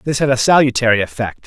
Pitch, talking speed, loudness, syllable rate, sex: 125 Hz, 205 wpm, -15 LUFS, 6.1 syllables/s, male